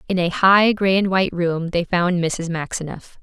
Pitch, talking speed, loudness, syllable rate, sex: 180 Hz, 205 wpm, -19 LUFS, 4.6 syllables/s, female